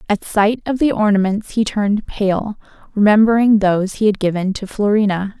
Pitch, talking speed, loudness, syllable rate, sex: 205 Hz, 165 wpm, -16 LUFS, 5.2 syllables/s, female